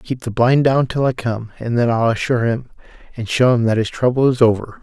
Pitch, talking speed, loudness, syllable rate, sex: 120 Hz, 250 wpm, -17 LUFS, 5.6 syllables/s, male